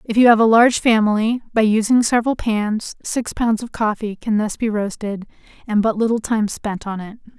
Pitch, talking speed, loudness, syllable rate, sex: 220 Hz, 205 wpm, -18 LUFS, 5.2 syllables/s, female